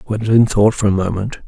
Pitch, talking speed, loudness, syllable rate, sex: 105 Hz, 205 wpm, -15 LUFS, 6.0 syllables/s, male